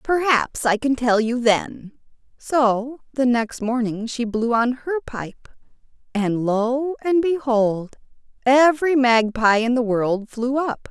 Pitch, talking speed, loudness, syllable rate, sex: 245 Hz, 145 wpm, -20 LUFS, 3.5 syllables/s, female